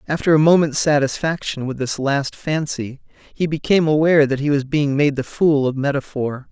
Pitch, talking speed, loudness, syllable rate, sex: 145 Hz, 185 wpm, -18 LUFS, 5.3 syllables/s, male